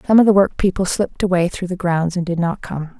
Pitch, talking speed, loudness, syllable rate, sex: 180 Hz, 260 wpm, -18 LUFS, 6.0 syllables/s, female